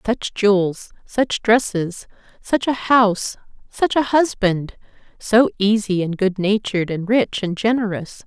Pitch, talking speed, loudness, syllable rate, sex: 210 Hz, 130 wpm, -19 LUFS, 4.1 syllables/s, female